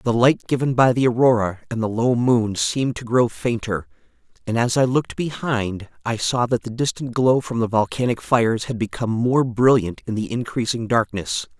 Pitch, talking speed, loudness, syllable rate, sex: 120 Hz, 190 wpm, -20 LUFS, 5.1 syllables/s, male